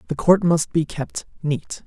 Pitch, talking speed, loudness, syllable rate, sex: 160 Hz, 195 wpm, -21 LUFS, 4.0 syllables/s, male